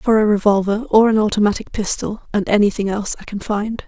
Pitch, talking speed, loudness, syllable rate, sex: 210 Hz, 200 wpm, -17 LUFS, 6.0 syllables/s, female